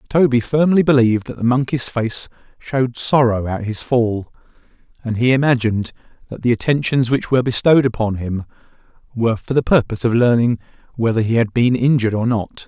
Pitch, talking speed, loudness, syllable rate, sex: 120 Hz, 170 wpm, -17 LUFS, 5.9 syllables/s, male